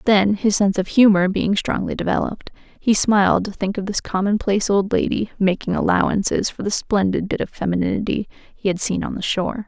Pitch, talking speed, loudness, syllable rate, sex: 200 Hz, 190 wpm, -19 LUFS, 5.6 syllables/s, female